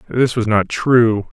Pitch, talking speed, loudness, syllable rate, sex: 115 Hz, 175 wpm, -16 LUFS, 3.4 syllables/s, male